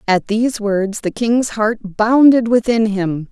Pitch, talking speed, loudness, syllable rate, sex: 220 Hz, 165 wpm, -15 LUFS, 3.8 syllables/s, female